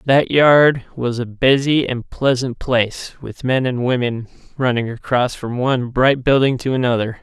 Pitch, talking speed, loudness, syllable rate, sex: 125 Hz, 165 wpm, -17 LUFS, 4.4 syllables/s, male